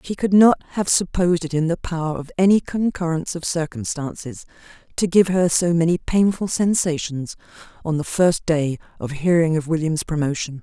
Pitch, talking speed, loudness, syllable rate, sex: 165 Hz, 170 wpm, -20 LUFS, 5.2 syllables/s, female